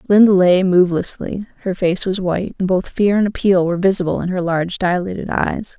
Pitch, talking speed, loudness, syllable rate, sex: 185 Hz, 195 wpm, -17 LUFS, 5.7 syllables/s, female